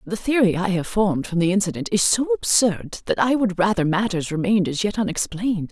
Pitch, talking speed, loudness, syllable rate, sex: 200 Hz, 210 wpm, -21 LUFS, 5.9 syllables/s, female